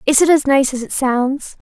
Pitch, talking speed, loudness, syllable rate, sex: 270 Hz, 245 wpm, -15 LUFS, 4.8 syllables/s, female